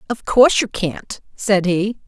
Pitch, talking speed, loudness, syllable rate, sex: 205 Hz, 175 wpm, -17 LUFS, 4.1 syllables/s, female